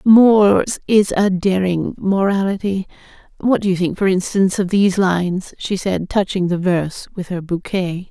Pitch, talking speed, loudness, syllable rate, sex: 190 Hz, 155 wpm, -17 LUFS, 4.7 syllables/s, female